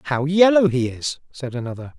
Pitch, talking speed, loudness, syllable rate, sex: 145 Hz, 180 wpm, -19 LUFS, 5.4 syllables/s, male